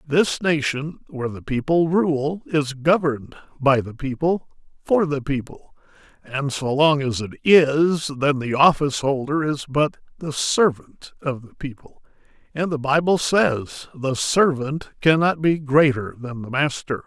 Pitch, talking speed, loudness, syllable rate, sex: 145 Hz, 145 wpm, -21 LUFS, 4.2 syllables/s, male